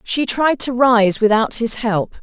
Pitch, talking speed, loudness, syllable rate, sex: 230 Hz, 190 wpm, -16 LUFS, 3.9 syllables/s, female